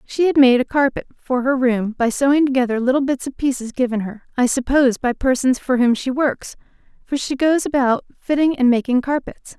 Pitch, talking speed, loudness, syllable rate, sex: 260 Hz, 205 wpm, -18 LUFS, 5.4 syllables/s, female